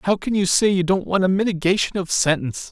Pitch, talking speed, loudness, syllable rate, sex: 185 Hz, 245 wpm, -19 LUFS, 6.0 syllables/s, male